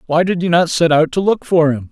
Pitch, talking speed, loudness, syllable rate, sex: 165 Hz, 315 wpm, -14 LUFS, 5.7 syllables/s, male